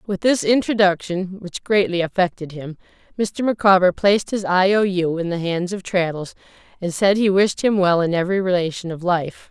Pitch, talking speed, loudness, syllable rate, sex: 185 Hz, 190 wpm, -19 LUFS, 4.8 syllables/s, female